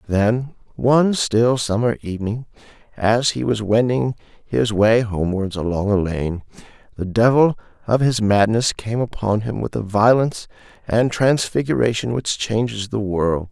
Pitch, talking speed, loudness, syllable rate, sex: 110 Hz, 140 wpm, -19 LUFS, 4.5 syllables/s, male